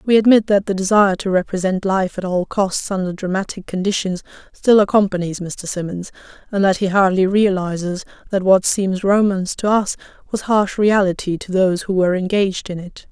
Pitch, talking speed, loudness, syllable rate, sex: 190 Hz, 180 wpm, -18 LUFS, 5.5 syllables/s, female